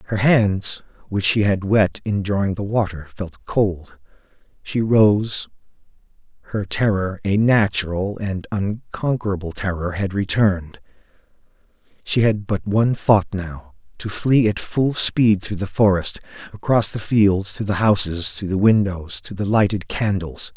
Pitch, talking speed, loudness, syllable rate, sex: 100 Hz, 145 wpm, -20 LUFS, 4.2 syllables/s, male